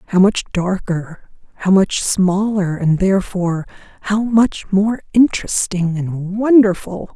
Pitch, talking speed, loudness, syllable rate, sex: 195 Hz, 115 wpm, -16 LUFS, 4.0 syllables/s, female